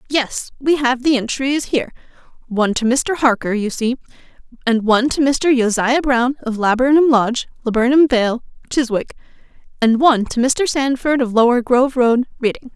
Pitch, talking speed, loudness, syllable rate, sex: 250 Hz, 160 wpm, -16 LUFS, 5.3 syllables/s, female